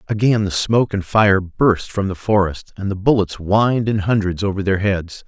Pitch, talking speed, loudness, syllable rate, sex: 100 Hz, 205 wpm, -18 LUFS, 4.9 syllables/s, male